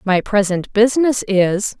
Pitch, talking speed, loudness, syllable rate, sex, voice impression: 210 Hz, 135 wpm, -16 LUFS, 4.1 syllables/s, female, feminine, adult-like, intellectual, calm, slightly elegant